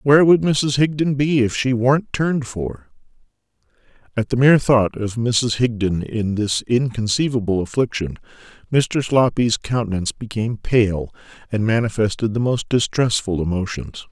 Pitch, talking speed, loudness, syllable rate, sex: 120 Hz, 135 wpm, -19 LUFS, 4.8 syllables/s, male